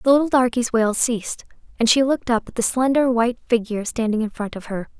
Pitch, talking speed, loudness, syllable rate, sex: 235 Hz, 230 wpm, -20 LUFS, 6.3 syllables/s, female